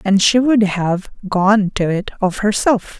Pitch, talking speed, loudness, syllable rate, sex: 200 Hz, 180 wpm, -16 LUFS, 3.8 syllables/s, female